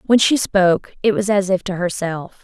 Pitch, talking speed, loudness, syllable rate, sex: 190 Hz, 220 wpm, -18 LUFS, 5.0 syllables/s, female